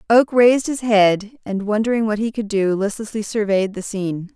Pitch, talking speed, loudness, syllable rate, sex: 215 Hz, 195 wpm, -19 LUFS, 5.3 syllables/s, female